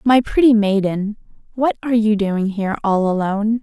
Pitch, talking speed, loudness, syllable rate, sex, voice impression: 215 Hz, 165 wpm, -17 LUFS, 5.3 syllables/s, female, very feminine, slightly young, very adult-like, very thin, very relaxed, weak, slightly dark, very soft, slightly muffled, fluent, slightly raspy, very cute, intellectual, very refreshing, sincere, very calm, very friendly, very reassuring, very unique, very elegant, very sweet, very kind, very modest, light